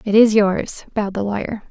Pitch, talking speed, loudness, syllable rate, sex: 210 Hz, 210 wpm, -18 LUFS, 5.4 syllables/s, female